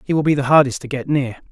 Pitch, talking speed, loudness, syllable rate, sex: 135 Hz, 315 wpm, -17 LUFS, 6.8 syllables/s, male